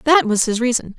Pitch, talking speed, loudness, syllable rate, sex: 250 Hz, 245 wpm, -17 LUFS, 5.8 syllables/s, female